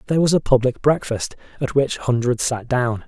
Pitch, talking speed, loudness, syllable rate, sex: 130 Hz, 195 wpm, -20 LUFS, 5.3 syllables/s, male